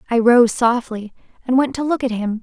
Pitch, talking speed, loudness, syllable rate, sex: 240 Hz, 225 wpm, -17 LUFS, 5.3 syllables/s, female